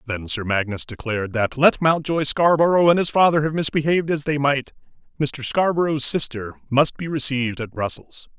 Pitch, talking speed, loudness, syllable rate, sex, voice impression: 140 Hz, 170 wpm, -20 LUFS, 5.3 syllables/s, male, very masculine, slightly old, thick, muffled, slightly calm, wild